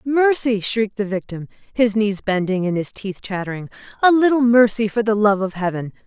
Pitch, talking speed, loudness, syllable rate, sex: 215 Hz, 180 wpm, -19 LUFS, 5.2 syllables/s, female